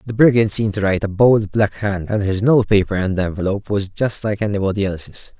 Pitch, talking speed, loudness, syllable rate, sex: 105 Hz, 220 wpm, -18 LUFS, 5.9 syllables/s, male